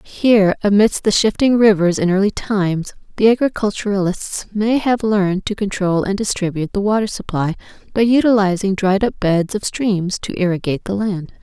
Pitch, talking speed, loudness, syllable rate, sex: 200 Hz, 165 wpm, -17 LUFS, 5.1 syllables/s, female